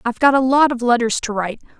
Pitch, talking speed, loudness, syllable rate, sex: 245 Hz, 270 wpm, -17 LUFS, 7.2 syllables/s, female